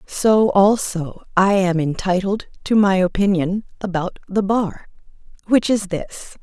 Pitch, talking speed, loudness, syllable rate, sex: 195 Hz, 130 wpm, -19 LUFS, 3.9 syllables/s, female